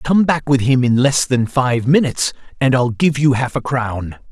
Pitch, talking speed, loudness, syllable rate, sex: 130 Hz, 225 wpm, -16 LUFS, 4.6 syllables/s, male